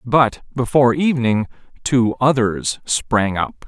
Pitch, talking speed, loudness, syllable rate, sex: 120 Hz, 115 wpm, -18 LUFS, 4.1 syllables/s, male